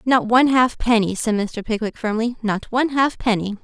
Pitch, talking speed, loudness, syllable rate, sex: 230 Hz, 165 wpm, -19 LUFS, 5.4 syllables/s, female